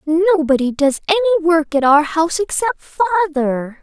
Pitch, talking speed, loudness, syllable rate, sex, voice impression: 330 Hz, 140 wpm, -16 LUFS, 5.4 syllables/s, female, feminine, young, clear, very cute, slightly friendly, slightly lively